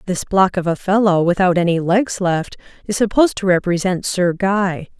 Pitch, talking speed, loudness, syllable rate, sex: 185 Hz, 180 wpm, -17 LUFS, 4.9 syllables/s, female